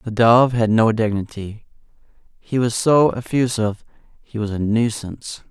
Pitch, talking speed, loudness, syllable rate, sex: 115 Hz, 140 wpm, -18 LUFS, 4.7 syllables/s, male